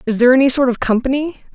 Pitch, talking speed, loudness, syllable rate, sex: 255 Hz, 235 wpm, -15 LUFS, 7.5 syllables/s, female